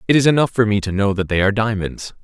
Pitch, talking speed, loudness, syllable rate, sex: 105 Hz, 295 wpm, -18 LUFS, 6.9 syllables/s, male